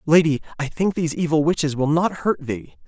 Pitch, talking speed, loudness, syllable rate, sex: 155 Hz, 210 wpm, -21 LUFS, 5.7 syllables/s, male